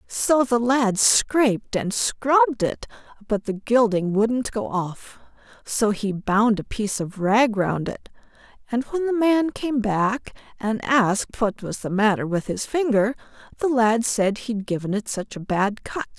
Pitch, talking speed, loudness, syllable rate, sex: 225 Hz, 175 wpm, -22 LUFS, 4.0 syllables/s, female